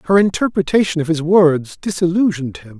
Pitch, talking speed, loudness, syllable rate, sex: 170 Hz, 150 wpm, -16 LUFS, 5.8 syllables/s, male